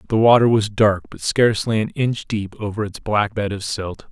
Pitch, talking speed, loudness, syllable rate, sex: 105 Hz, 220 wpm, -19 LUFS, 5.0 syllables/s, male